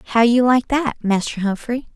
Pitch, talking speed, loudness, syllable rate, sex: 235 Hz, 185 wpm, -18 LUFS, 5.1 syllables/s, female